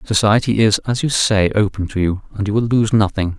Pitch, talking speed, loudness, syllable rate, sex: 105 Hz, 230 wpm, -17 LUFS, 5.5 syllables/s, male